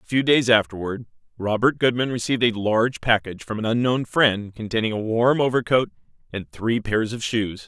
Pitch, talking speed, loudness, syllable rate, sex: 115 Hz, 180 wpm, -21 LUFS, 5.4 syllables/s, male